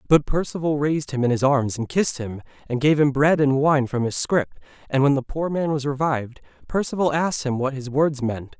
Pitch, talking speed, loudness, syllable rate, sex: 140 Hz, 230 wpm, -22 LUFS, 5.6 syllables/s, male